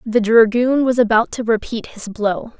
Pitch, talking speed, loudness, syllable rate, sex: 225 Hz, 185 wpm, -16 LUFS, 4.4 syllables/s, female